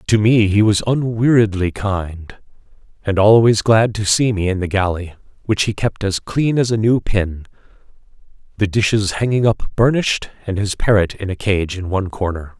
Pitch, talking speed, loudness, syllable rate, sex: 105 Hz, 180 wpm, -17 LUFS, 4.9 syllables/s, male